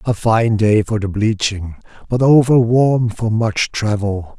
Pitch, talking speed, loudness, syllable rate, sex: 110 Hz, 165 wpm, -16 LUFS, 3.8 syllables/s, male